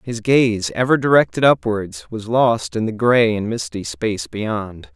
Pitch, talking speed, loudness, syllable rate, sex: 110 Hz, 170 wpm, -18 LUFS, 4.2 syllables/s, male